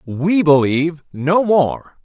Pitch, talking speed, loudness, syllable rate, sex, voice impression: 160 Hz, 120 wpm, -16 LUFS, 3.3 syllables/s, male, masculine, adult-like, slightly clear, fluent, refreshing, friendly, slightly kind